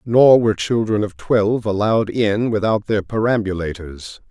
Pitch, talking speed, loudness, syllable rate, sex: 105 Hz, 140 wpm, -18 LUFS, 4.8 syllables/s, male